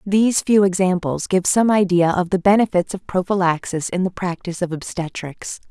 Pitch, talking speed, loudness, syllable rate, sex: 185 Hz, 170 wpm, -19 LUFS, 5.2 syllables/s, female